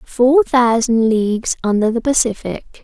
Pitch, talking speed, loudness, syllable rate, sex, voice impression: 235 Hz, 125 wpm, -15 LUFS, 4.1 syllables/s, female, feminine, adult-like, slightly relaxed, slightly dark, soft, raspy, calm, friendly, reassuring, kind, slightly modest